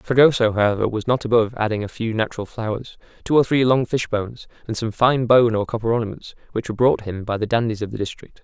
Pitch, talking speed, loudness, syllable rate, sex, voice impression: 115 Hz, 235 wpm, -20 LUFS, 6.4 syllables/s, male, masculine, slightly young, tensed, bright, clear, fluent, slightly cool, refreshing, sincere, friendly, unique, kind, slightly modest